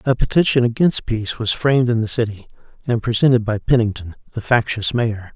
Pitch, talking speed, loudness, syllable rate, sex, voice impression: 115 Hz, 180 wpm, -18 LUFS, 5.8 syllables/s, male, masculine, adult-like, slightly cool, sincere, calm, slightly sweet